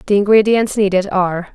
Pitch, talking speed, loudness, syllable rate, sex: 200 Hz, 155 wpm, -14 LUFS, 6.0 syllables/s, female